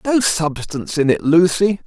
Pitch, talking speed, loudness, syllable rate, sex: 165 Hz, 160 wpm, -17 LUFS, 4.6 syllables/s, male